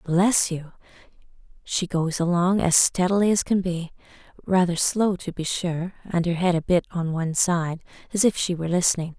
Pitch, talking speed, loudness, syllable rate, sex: 175 Hz, 190 wpm, -23 LUFS, 5.1 syllables/s, female